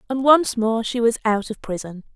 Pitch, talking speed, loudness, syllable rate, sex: 230 Hz, 220 wpm, -20 LUFS, 5.0 syllables/s, female